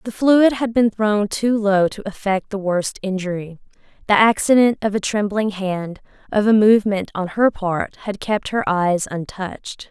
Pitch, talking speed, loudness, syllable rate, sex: 205 Hz, 175 wpm, -19 LUFS, 4.4 syllables/s, female